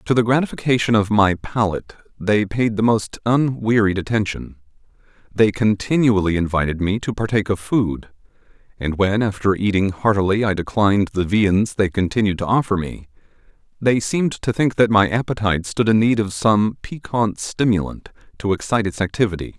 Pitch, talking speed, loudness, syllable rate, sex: 105 Hz, 160 wpm, -19 LUFS, 5.3 syllables/s, male